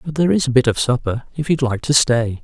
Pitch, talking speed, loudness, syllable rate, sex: 130 Hz, 295 wpm, -17 LUFS, 6.5 syllables/s, male